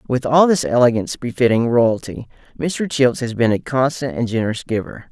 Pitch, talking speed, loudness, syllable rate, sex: 125 Hz, 175 wpm, -18 LUFS, 5.2 syllables/s, male